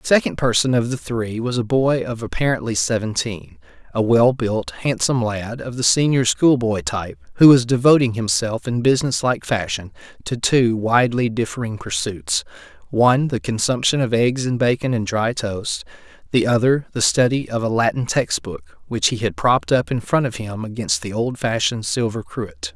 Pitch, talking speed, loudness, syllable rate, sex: 115 Hz, 170 wpm, -19 LUFS, 5.1 syllables/s, male